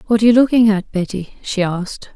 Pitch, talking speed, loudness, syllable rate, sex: 210 Hz, 220 wpm, -16 LUFS, 6.4 syllables/s, female